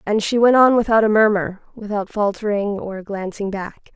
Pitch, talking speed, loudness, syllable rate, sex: 210 Hz, 180 wpm, -18 LUFS, 5.0 syllables/s, female